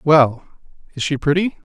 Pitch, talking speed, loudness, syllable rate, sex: 155 Hz, 140 wpm, -18 LUFS, 4.6 syllables/s, male